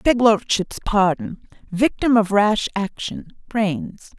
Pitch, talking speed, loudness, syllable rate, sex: 205 Hz, 70 wpm, -20 LUFS, 3.4 syllables/s, female